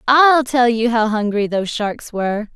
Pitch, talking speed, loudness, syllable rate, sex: 230 Hz, 190 wpm, -17 LUFS, 4.6 syllables/s, female